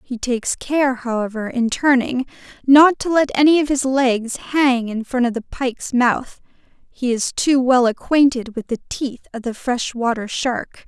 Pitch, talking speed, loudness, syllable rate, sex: 255 Hz, 180 wpm, -18 LUFS, 4.3 syllables/s, female